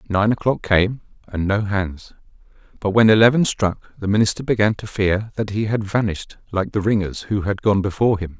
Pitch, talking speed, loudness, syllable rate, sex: 105 Hz, 195 wpm, -19 LUFS, 5.6 syllables/s, male